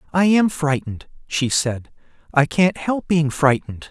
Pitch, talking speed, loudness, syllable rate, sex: 155 Hz, 155 wpm, -19 LUFS, 4.6 syllables/s, male